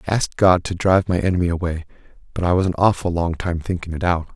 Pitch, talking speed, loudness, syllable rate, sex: 90 Hz, 250 wpm, -20 LUFS, 6.8 syllables/s, male